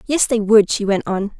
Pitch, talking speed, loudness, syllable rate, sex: 210 Hz, 260 wpm, -16 LUFS, 4.8 syllables/s, female